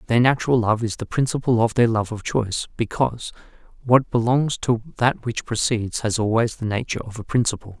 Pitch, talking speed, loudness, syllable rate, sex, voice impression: 115 Hz, 190 wpm, -21 LUFS, 6.0 syllables/s, male, masculine, adult-like, slightly fluent, refreshing, friendly, slightly kind